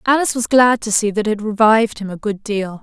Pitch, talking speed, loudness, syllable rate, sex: 215 Hz, 255 wpm, -16 LUFS, 5.9 syllables/s, female